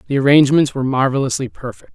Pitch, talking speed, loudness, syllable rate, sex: 135 Hz, 155 wpm, -15 LUFS, 7.4 syllables/s, male